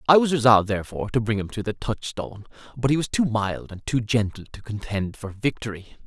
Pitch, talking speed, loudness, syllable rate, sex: 110 Hz, 230 wpm, -24 LUFS, 6.1 syllables/s, male